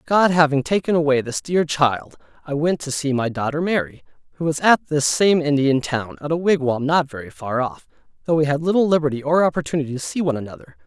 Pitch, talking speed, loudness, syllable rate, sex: 150 Hz, 215 wpm, -20 LUFS, 5.9 syllables/s, male